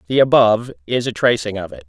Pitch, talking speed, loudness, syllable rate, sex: 110 Hz, 225 wpm, -17 LUFS, 6.3 syllables/s, male